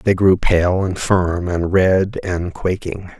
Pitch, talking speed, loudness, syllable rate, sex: 90 Hz, 170 wpm, -18 LUFS, 3.2 syllables/s, male